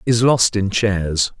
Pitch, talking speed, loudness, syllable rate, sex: 105 Hz, 170 wpm, -17 LUFS, 3.2 syllables/s, male